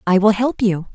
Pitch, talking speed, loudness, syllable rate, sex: 205 Hz, 255 wpm, -17 LUFS, 5.1 syllables/s, female